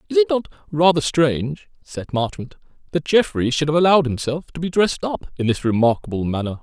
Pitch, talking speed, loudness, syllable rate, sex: 150 Hz, 190 wpm, -20 LUFS, 5.9 syllables/s, male